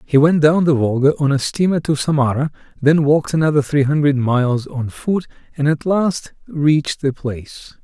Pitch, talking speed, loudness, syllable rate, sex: 145 Hz, 185 wpm, -17 LUFS, 5.0 syllables/s, male